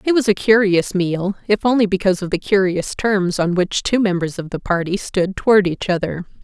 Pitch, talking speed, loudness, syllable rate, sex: 190 Hz, 205 wpm, -18 LUFS, 5.3 syllables/s, female